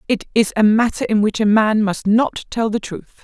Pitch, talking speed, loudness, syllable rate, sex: 215 Hz, 240 wpm, -17 LUFS, 5.0 syllables/s, female